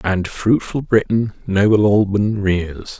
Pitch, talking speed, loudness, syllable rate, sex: 100 Hz, 120 wpm, -17 LUFS, 3.6 syllables/s, male